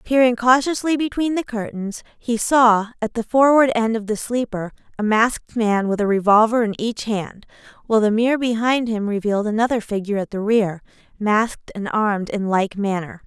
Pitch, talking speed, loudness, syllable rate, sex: 220 Hz, 180 wpm, -19 LUFS, 5.2 syllables/s, female